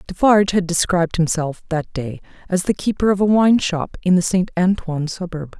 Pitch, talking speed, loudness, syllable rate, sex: 180 Hz, 195 wpm, -18 LUFS, 5.4 syllables/s, female